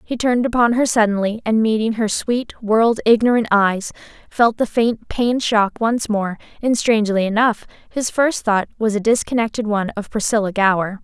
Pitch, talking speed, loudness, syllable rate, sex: 220 Hz, 175 wpm, -18 LUFS, 5.1 syllables/s, female